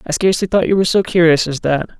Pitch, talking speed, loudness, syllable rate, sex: 170 Hz, 270 wpm, -15 LUFS, 7.2 syllables/s, male